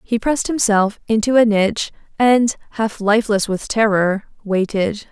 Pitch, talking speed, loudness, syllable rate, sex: 215 Hz, 140 wpm, -17 LUFS, 4.6 syllables/s, female